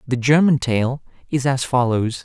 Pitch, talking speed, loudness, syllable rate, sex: 130 Hz, 160 wpm, -19 LUFS, 4.4 syllables/s, male